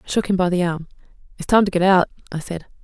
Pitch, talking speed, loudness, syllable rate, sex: 180 Hz, 275 wpm, -19 LUFS, 7.1 syllables/s, female